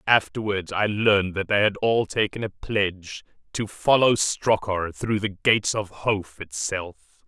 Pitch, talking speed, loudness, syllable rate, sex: 100 Hz, 155 wpm, -23 LUFS, 4.3 syllables/s, male